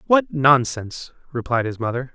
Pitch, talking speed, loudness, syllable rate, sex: 135 Hz, 140 wpm, -20 LUFS, 5.1 syllables/s, male